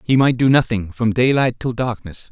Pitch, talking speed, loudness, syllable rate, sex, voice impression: 120 Hz, 205 wpm, -17 LUFS, 5.0 syllables/s, male, masculine, middle-aged, tensed, slightly powerful, hard, clear, fluent, cool, intellectual, friendly, wild, strict, slightly sharp